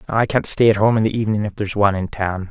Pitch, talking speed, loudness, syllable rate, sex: 105 Hz, 310 wpm, -18 LUFS, 7.3 syllables/s, male